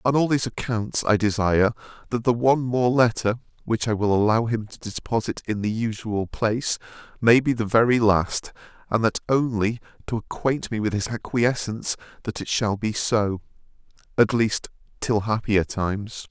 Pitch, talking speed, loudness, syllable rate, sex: 110 Hz, 170 wpm, -23 LUFS, 5.1 syllables/s, male